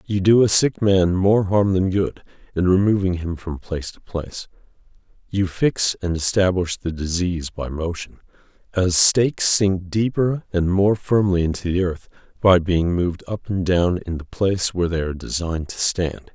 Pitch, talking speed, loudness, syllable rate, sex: 90 Hz, 180 wpm, -20 LUFS, 4.9 syllables/s, male